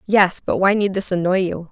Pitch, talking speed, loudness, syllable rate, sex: 190 Hz, 245 wpm, -18 LUFS, 5.4 syllables/s, female